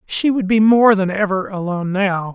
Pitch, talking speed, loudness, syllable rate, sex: 195 Hz, 205 wpm, -16 LUFS, 5.0 syllables/s, male